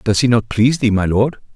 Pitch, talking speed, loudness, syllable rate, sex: 115 Hz, 270 wpm, -16 LUFS, 6.0 syllables/s, male